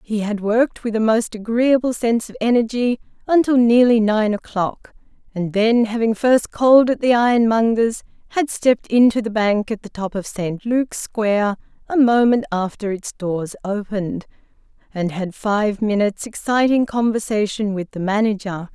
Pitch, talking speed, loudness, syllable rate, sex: 220 Hz, 155 wpm, -19 LUFS, 4.9 syllables/s, female